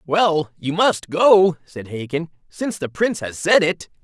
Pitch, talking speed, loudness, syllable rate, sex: 165 Hz, 180 wpm, -19 LUFS, 4.3 syllables/s, male